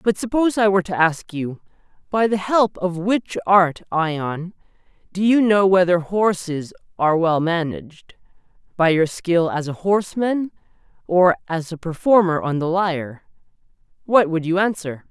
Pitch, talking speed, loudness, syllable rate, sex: 180 Hz, 150 wpm, -19 LUFS, 4.6 syllables/s, male